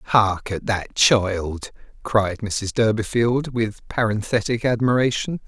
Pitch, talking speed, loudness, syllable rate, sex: 110 Hz, 110 wpm, -21 LUFS, 3.7 syllables/s, male